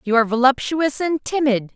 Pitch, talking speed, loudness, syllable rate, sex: 265 Hz, 170 wpm, -19 LUFS, 5.5 syllables/s, female